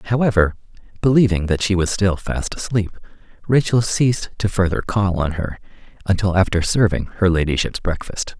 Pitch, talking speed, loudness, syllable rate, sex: 95 Hz, 150 wpm, -19 LUFS, 5.3 syllables/s, male